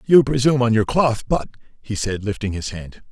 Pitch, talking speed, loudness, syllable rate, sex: 115 Hz, 210 wpm, -20 LUFS, 5.7 syllables/s, male